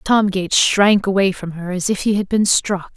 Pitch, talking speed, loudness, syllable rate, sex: 195 Hz, 245 wpm, -17 LUFS, 4.8 syllables/s, female